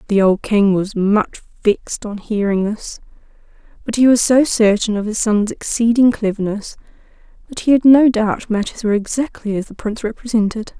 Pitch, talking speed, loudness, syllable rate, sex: 215 Hz, 170 wpm, -16 LUFS, 5.2 syllables/s, female